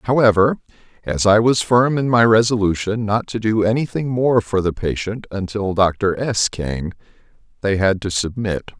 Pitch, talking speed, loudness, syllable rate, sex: 105 Hz, 170 wpm, -18 LUFS, 4.6 syllables/s, male